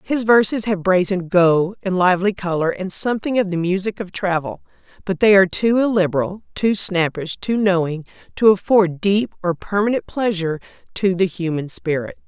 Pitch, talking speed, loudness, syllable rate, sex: 190 Hz, 165 wpm, -18 LUFS, 5.2 syllables/s, female